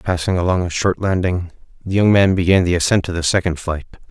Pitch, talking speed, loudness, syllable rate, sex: 90 Hz, 220 wpm, -17 LUFS, 5.9 syllables/s, male